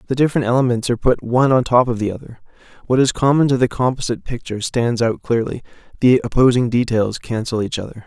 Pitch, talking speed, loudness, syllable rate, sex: 120 Hz, 200 wpm, -18 LUFS, 6.6 syllables/s, male